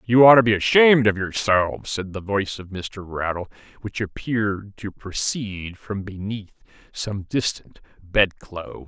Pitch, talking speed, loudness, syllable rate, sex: 100 Hz, 155 wpm, -21 LUFS, 4.5 syllables/s, male